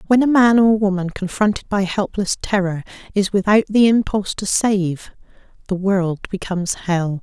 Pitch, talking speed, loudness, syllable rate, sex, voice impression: 195 Hz, 160 wpm, -18 LUFS, 4.9 syllables/s, female, very feminine, slightly old, thin, slightly tensed, slightly weak, bright, hard, muffled, fluent, slightly raspy, slightly cool, intellectual, very refreshing, very sincere, calm, friendly, reassuring, very unique, very elegant, slightly wild, sweet, slightly lively, kind, slightly intense, sharp, slightly modest, slightly light